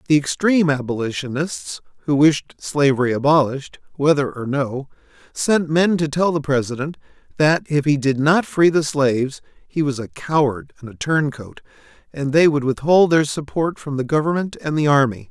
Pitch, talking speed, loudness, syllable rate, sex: 145 Hz, 170 wpm, -19 LUFS, 5.0 syllables/s, male